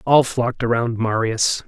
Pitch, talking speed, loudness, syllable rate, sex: 120 Hz, 145 wpm, -19 LUFS, 4.6 syllables/s, male